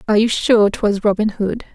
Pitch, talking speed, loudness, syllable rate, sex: 210 Hz, 205 wpm, -16 LUFS, 5.4 syllables/s, female